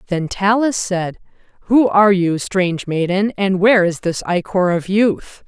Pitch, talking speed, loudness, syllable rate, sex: 190 Hz, 165 wpm, -16 LUFS, 4.5 syllables/s, female